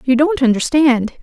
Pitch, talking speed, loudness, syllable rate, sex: 270 Hz, 145 wpm, -14 LUFS, 4.8 syllables/s, female